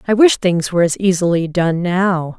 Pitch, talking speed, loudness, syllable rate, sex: 180 Hz, 200 wpm, -15 LUFS, 4.9 syllables/s, female